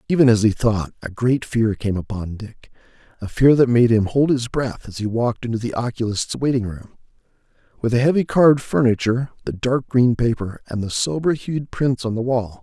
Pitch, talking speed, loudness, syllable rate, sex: 120 Hz, 205 wpm, -20 LUFS, 5.4 syllables/s, male